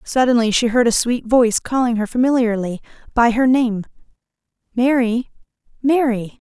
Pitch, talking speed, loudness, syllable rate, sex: 240 Hz, 130 wpm, -17 LUFS, 5.1 syllables/s, female